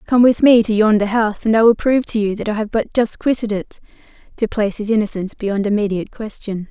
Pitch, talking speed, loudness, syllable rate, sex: 215 Hz, 225 wpm, -17 LUFS, 6.4 syllables/s, female